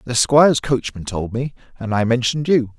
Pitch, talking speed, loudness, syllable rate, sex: 120 Hz, 195 wpm, -18 LUFS, 5.4 syllables/s, male